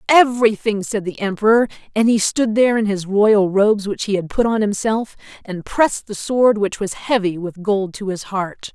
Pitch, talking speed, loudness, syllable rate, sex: 210 Hz, 205 wpm, -18 LUFS, 5.0 syllables/s, female